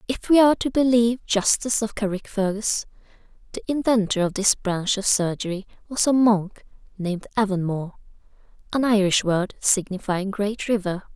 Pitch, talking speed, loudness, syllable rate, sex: 210 Hz, 135 wpm, -22 LUFS, 5.1 syllables/s, female